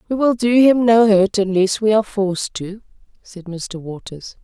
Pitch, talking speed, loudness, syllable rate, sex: 205 Hz, 190 wpm, -16 LUFS, 4.7 syllables/s, female